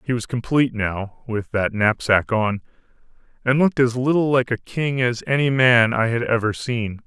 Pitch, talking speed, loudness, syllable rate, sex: 120 Hz, 185 wpm, -20 LUFS, 4.9 syllables/s, male